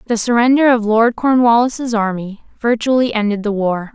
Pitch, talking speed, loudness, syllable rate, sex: 225 Hz, 150 wpm, -15 LUFS, 4.9 syllables/s, female